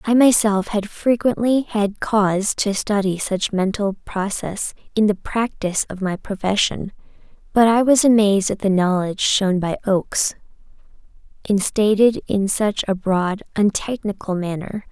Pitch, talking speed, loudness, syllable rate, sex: 205 Hz, 140 wpm, -19 LUFS, 4.6 syllables/s, female